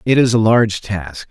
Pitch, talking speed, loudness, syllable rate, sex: 110 Hz, 230 wpm, -15 LUFS, 5.1 syllables/s, male